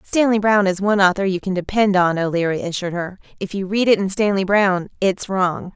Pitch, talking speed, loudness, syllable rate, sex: 190 Hz, 220 wpm, -18 LUFS, 6.0 syllables/s, female